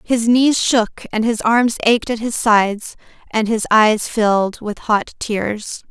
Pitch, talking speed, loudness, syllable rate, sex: 220 Hz, 175 wpm, -17 LUFS, 3.7 syllables/s, female